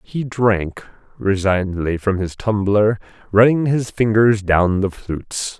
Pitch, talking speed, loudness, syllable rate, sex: 105 Hz, 130 wpm, -18 LUFS, 4.0 syllables/s, male